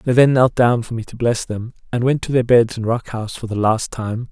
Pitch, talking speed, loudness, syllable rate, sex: 120 Hz, 290 wpm, -18 LUFS, 5.4 syllables/s, male